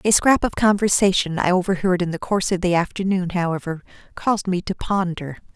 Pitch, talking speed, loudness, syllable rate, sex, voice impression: 185 Hz, 185 wpm, -20 LUFS, 5.8 syllables/s, female, feminine, adult-like, tensed, powerful, bright, soft, fluent, intellectual, calm, friendly, reassuring, elegant, lively, kind